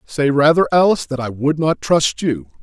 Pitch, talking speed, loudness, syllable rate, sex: 145 Hz, 205 wpm, -16 LUFS, 5.0 syllables/s, male